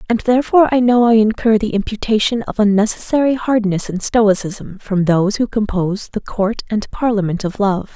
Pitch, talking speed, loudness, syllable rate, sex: 215 Hz, 175 wpm, -16 LUFS, 5.4 syllables/s, female